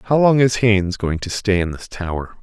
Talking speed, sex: 250 wpm, male